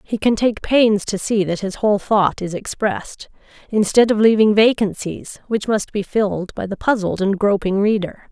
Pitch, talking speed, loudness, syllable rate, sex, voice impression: 205 Hz, 190 wpm, -18 LUFS, 4.8 syllables/s, female, very feminine, adult-like, slightly middle-aged, slightly thin, tensed, slightly powerful, slightly bright, hard, very clear, fluent, slightly raspy, slightly cool, intellectual, slightly refreshing, very sincere, slightly calm, slightly friendly, slightly reassuring, slightly unique, elegant, slightly wild, slightly sweet, slightly lively, slightly kind, strict, intense, slightly sharp, slightly modest